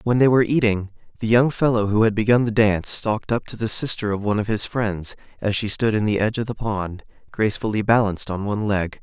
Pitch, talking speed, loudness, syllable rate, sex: 110 Hz, 240 wpm, -21 LUFS, 6.3 syllables/s, male